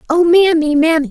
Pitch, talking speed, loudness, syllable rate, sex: 320 Hz, 165 wpm, -12 LUFS, 5.5 syllables/s, female